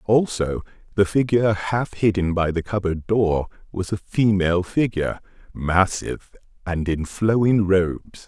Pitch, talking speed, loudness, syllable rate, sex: 95 Hz, 125 wpm, -21 LUFS, 4.5 syllables/s, male